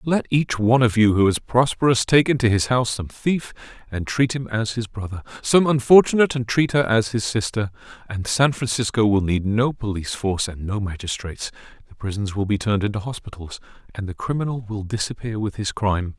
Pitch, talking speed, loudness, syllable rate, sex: 110 Hz, 200 wpm, -21 LUFS, 5.8 syllables/s, male